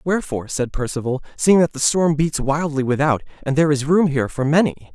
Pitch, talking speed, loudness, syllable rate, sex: 150 Hz, 205 wpm, -19 LUFS, 6.0 syllables/s, male